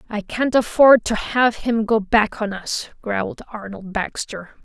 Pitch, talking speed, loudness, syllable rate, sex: 220 Hz, 170 wpm, -19 LUFS, 4.0 syllables/s, female